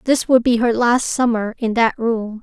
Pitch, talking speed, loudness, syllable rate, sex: 235 Hz, 225 wpm, -17 LUFS, 4.4 syllables/s, female